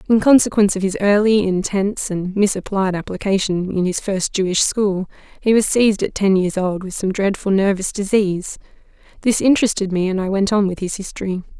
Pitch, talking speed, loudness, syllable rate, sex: 195 Hz, 185 wpm, -18 LUFS, 5.7 syllables/s, female